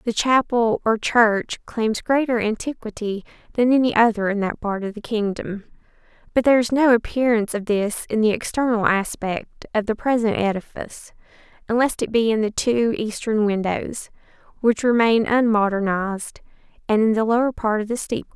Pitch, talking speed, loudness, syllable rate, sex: 220 Hz, 165 wpm, -21 LUFS, 5.1 syllables/s, female